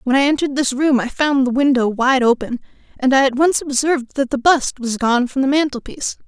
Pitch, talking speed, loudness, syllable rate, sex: 265 Hz, 230 wpm, -17 LUFS, 5.8 syllables/s, female